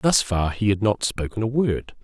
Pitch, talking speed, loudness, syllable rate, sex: 110 Hz, 235 wpm, -22 LUFS, 4.6 syllables/s, male